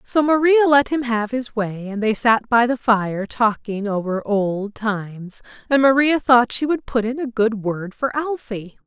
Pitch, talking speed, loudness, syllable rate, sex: 235 Hz, 195 wpm, -19 LUFS, 4.2 syllables/s, female